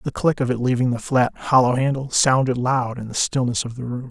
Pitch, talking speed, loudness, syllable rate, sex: 125 Hz, 250 wpm, -20 LUFS, 5.5 syllables/s, male